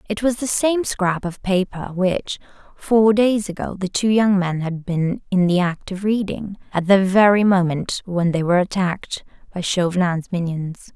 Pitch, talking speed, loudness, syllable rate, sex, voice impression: 190 Hz, 180 wpm, -19 LUFS, 4.6 syllables/s, female, very feminine, slightly adult-like, thin, tensed, slightly powerful, dark, soft, slightly muffled, fluent, slightly raspy, very cute, very intellectual, slightly refreshing, sincere, very calm, very friendly, reassuring, unique, very elegant, wild, very sweet, kind, slightly intense, modest